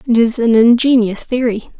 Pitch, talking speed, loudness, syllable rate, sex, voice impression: 235 Hz, 170 wpm, -13 LUFS, 5.0 syllables/s, female, feminine, adult-like, slightly relaxed, soft, raspy, intellectual, calm, friendly, reassuring, slightly kind, modest